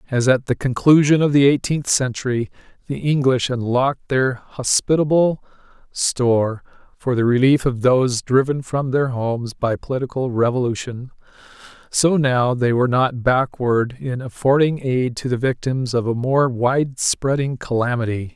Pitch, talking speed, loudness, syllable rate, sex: 130 Hz, 145 wpm, -19 LUFS, 4.7 syllables/s, male